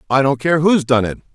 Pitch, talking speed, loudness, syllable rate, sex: 140 Hz, 270 wpm, -16 LUFS, 5.8 syllables/s, male